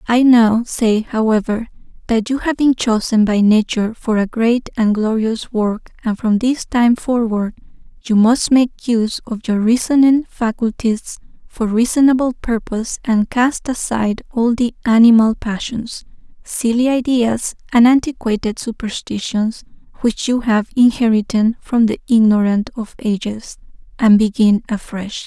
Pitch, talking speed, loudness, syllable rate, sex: 230 Hz, 135 wpm, -16 LUFS, 4.3 syllables/s, female